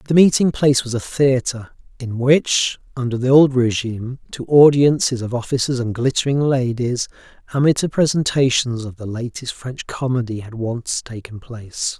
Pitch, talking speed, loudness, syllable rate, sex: 125 Hz, 150 wpm, -18 LUFS, 4.9 syllables/s, male